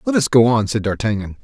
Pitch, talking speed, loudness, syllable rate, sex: 115 Hz, 250 wpm, -17 LUFS, 6.3 syllables/s, male